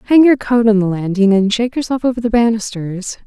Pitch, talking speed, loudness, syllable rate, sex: 220 Hz, 220 wpm, -14 LUFS, 6.0 syllables/s, female